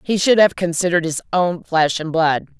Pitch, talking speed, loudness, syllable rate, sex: 170 Hz, 210 wpm, -17 LUFS, 5.2 syllables/s, female